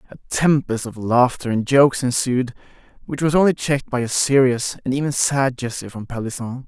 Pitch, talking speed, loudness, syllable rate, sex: 130 Hz, 180 wpm, -19 LUFS, 5.6 syllables/s, male